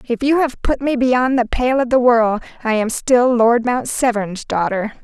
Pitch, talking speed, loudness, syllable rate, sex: 240 Hz, 215 wpm, -17 LUFS, 4.4 syllables/s, female